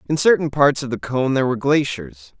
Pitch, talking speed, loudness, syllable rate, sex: 130 Hz, 225 wpm, -18 LUFS, 6.0 syllables/s, male